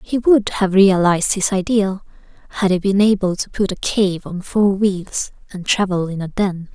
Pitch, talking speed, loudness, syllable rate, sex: 190 Hz, 195 wpm, -17 LUFS, 4.5 syllables/s, female